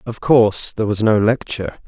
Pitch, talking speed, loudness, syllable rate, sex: 110 Hz, 190 wpm, -17 LUFS, 6.0 syllables/s, male